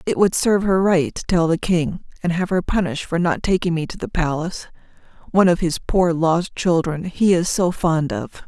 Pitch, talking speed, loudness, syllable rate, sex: 170 Hz, 210 wpm, -19 LUFS, 5.2 syllables/s, female